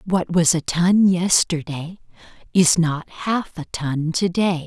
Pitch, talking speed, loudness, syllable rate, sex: 170 Hz, 140 wpm, -19 LUFS, 3.5 syllables/s, female